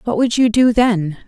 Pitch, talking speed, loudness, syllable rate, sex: 220 Hz, 235 wpm, -15 LUFS, 4.6 syllables/s, female